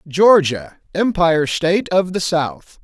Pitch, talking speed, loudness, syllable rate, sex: 175 Hz, 125 wpm, -16 LUFS, 3.9 syllables/s, male